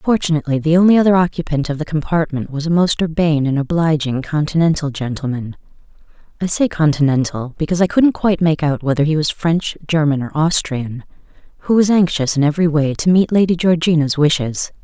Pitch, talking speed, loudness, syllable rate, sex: 155 Hz, 165 wpm, -16 LUFS, 5.9 syllables/s, female